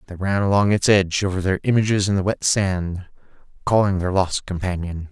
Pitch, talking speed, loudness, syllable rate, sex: 95 Hz, 190 wpm, -20 LUFS, 5.7 syllables/s, male